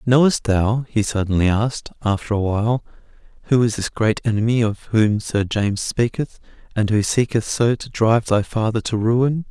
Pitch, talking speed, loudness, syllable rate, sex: 110 Hz, 175 wpm, -20 LUFS, 5.0 syllables/s, male